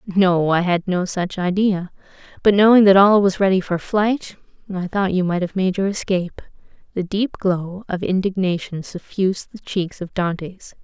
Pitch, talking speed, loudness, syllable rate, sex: 185 Hz, 175 wpm, -19 LUFS, 4.7 syllables/s, female